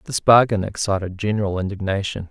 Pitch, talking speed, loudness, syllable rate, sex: 100 Hz, 130 wpm, -20 LUFS, 6.1 syllables/s, male